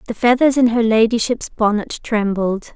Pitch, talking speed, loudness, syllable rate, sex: 225 Hz, 150 wpm, -17 LUFS, 4.7 syllables/s, female